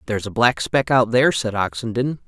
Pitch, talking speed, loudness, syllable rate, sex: 120 Hz, 210 wpm, -19 LUFS, 5.8 syllables/s, male